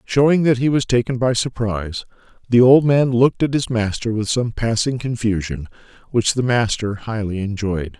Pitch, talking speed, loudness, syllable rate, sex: 115 Hz, 175 wpm, -18 LUFS, 5.0 syllables/s, male